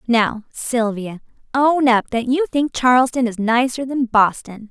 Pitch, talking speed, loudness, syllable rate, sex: 245 Hz, 155 wpm, -18 LUFS, 4.1 syllables/s, female